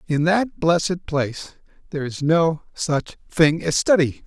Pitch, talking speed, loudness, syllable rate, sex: 160 Hz, 155 wpm, -20 LUFS, 4.4 syllables/s, male